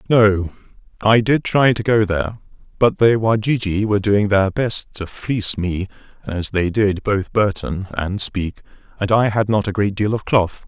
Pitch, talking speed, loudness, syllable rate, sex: 105 Hz, 185 wpm, -18 LUFS, 4.5 syllables/s, male